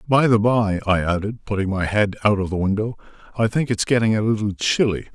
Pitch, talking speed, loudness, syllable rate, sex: 105 Hz, 220 wpm, -20 LUFS, 5.9 syllables/s, male